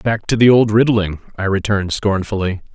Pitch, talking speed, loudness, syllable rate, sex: 105 Hz, 175 wpm, -16 LUFS, 5.3 syllables/s, male